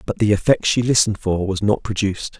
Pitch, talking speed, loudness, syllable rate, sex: 105 Hz, 225 wpm, -18 LUFS, 6.2 syllables/s, male